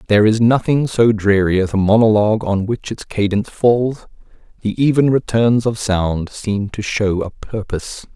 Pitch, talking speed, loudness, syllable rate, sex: 110 Hz, 170 wpm, -16 LUFS, 4.8 syllables/s, male